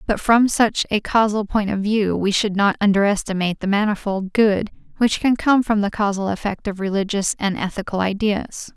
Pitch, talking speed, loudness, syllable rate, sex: 205 Hz, 185 wpm, -19 LUFS, 5.1 syllables/s, female